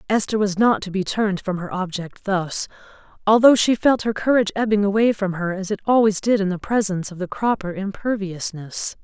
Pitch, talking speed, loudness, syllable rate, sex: 200 Hz, 200 wpm, -20 LUFS, 5.5 syllables/s, female